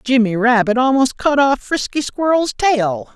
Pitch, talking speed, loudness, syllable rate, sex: 255 Hz, 150 wpm, -16 LUFS, 4.2 syllables/s, female